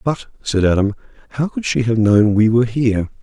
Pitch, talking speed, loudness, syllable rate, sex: 115 Hz, 205 wpm, -16 LUFS, 5.8 syllables/s, male